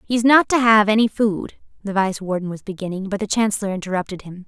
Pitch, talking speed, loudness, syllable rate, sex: 205 Hz, 215 wpm, -19 LUFS, 6.2 syllables/s, female